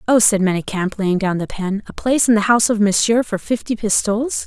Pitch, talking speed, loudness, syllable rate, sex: 210 Hz, 230 wpm, -17 LUFS, 6.2 syllables/s, female